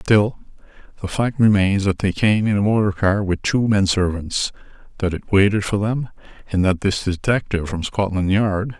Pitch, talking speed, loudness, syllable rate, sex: 100 Hz, 185 wpm, -19 LUFS, 5.0 syllables/s, male